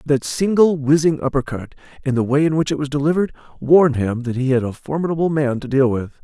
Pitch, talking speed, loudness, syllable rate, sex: 140 Hz, 220 wpm, -18 LUFS, 6.3 syllables/s, male